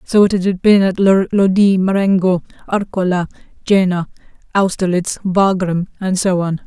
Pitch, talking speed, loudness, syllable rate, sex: 190 Hz, 125 wpm, -15 LUFS, 4.4 syllables/s, female